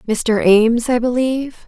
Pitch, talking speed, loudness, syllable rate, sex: 235 Hz, 145 wpm, -15 LUFS, 4.9 syllables/s, female